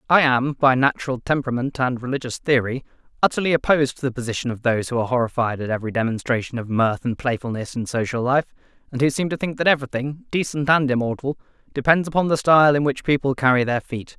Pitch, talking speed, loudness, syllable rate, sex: 130 Hz, 205 wpm, -21 LUFS, 6.6 syllables/s, male